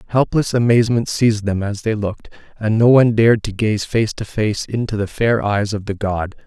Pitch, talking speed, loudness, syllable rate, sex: 110 Hz, 215 wpm, -17 LUFS, 5.5 syllables/s, male